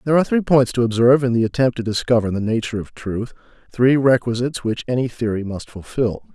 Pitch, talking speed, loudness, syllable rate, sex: 120 Hz, 210 wpm, -19 LUFS, 6.5 syllables/s, male